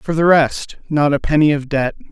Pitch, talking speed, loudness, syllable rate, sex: 150 Hz, 225 wpm, -16 LUFS, 4.9 syllables/s, male